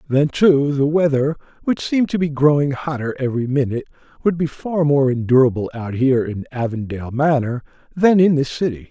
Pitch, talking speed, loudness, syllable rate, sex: 140 Hz, 175 wpm, -18 LUFS, 5.6 syllables/s, male